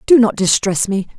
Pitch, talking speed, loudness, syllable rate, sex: 205 Hz, 205 wpm, -15 LUFS, 5.1 syllables/s, female